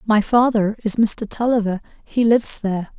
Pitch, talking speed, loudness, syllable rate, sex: 220 Hz, 160 wpm, -18 LUFS, 5.1 syllables/s, female